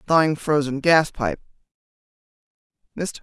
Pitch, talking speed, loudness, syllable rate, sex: 155 Hz, 75 wpm, -21 LUFS, 4.6 syllables/s, female